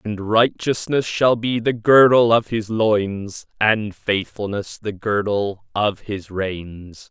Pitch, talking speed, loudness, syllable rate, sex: 105 Hz, 135 wpm, -19 LUFS, 3.3 syllables/s, male